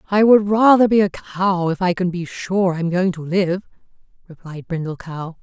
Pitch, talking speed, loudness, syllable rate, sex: 180 Hz, 210 wpm, -18 LUFS, 4.8 syllables/s, female